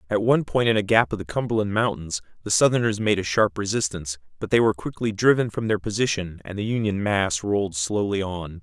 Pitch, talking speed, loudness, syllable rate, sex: 100 Hz, 215 wpm, -23 LUFS, 6.0 syllables/s, male